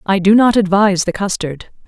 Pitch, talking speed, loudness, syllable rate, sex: 195 Hz, 190 wpm, -14 LUFS, 5.6 syllables/s, female